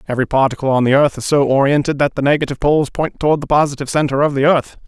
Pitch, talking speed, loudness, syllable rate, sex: 140 Hz, 245 wpm, -15 LUFS, 7.6 syllables/s, male